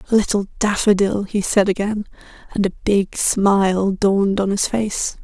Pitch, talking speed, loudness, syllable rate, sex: 200 Hz, 150 wpm, -18 LUFS, 4.5 syllables/s, female